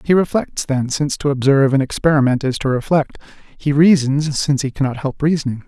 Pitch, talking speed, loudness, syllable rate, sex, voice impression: 140 Hz, 190 wpm, -17 LUFS, 5.9 syllables/s, male, masculine, adult-like, slightly muffled, sincere, slightly calm, slightly sweet, kind